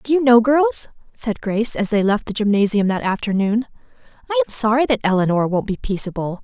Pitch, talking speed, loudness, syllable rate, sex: 225 Hz, 195 wpm, -18 LUFS, 5.9 syllables/s, female